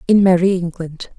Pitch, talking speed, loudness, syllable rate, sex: 180 Hz, 150 wpm, -15 LUFS, 5.0 syllables/s, female